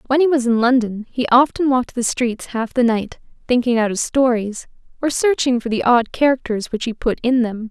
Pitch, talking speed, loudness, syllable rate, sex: 245 Hz, 220 wpm, -18 LUFS, 5.3 syllables/s, female